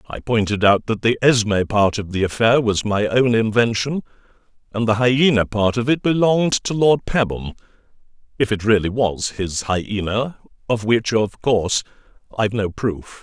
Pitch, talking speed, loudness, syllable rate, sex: 110 Hz, 170 wpm, -19 LUFS, 4.7 syllables/s, male